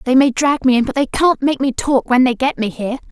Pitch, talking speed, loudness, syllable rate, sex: 260 Hz, 310 wpm, -16 LUFS, 6.0 syllables/s, female